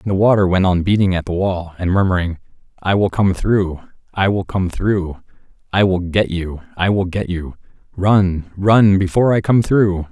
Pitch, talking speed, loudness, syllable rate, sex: 95 Hz, 185 wpm, -17 LUFS, 4.8 syllables/s, male